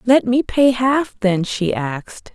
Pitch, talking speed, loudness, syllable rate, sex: 230 Hz, 180 wpm, -17 LUFS, 3.7 syllables/s, female